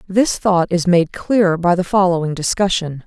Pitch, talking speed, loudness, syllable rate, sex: 180 Hz, 175 wpm, -16 LUFS, 4.9 syllables/s, female